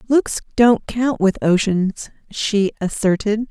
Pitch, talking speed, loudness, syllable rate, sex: 215 Hz, 120 wpm, -18 LUFS, 3.5 syllables/s, female